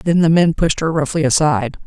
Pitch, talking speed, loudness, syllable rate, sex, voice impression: 155 Hz, 225 wpm, -15 LUFS, 6.0 syllables/s, female, feminine, adult-like, fluent, slightly refreshing, friendly, slightly elegant